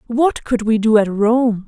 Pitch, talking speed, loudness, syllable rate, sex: 230 Hz, 215 wpm, -16 LUFS, 4.0 syllables/s, female